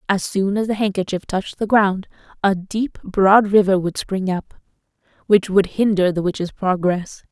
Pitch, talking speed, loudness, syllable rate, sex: 195 Hz, 170 wpm, -19 LUFS, 4.5 syllables/s, female